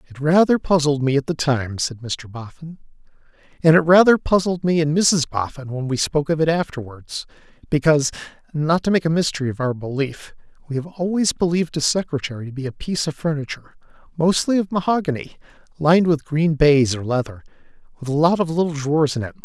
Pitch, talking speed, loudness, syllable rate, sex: 150 Hz, 190 wpm, -20 LUFS, 5.6 syllables/s, male